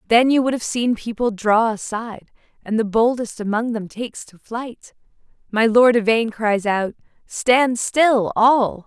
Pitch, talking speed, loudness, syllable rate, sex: 225 Hz, 165 wpm, -19 LUFS, 4.2 syllables/s, female